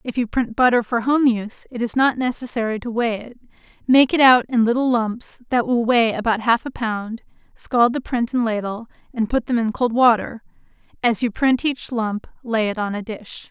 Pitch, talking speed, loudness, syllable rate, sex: 235 Hz, 215 wpm, -20 LUFS, 5.0 syllables/s, female